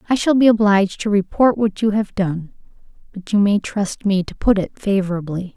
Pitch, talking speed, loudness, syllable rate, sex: 200 Hz, 195 wpm, -18 LUFS, 5.3 syllables/s, female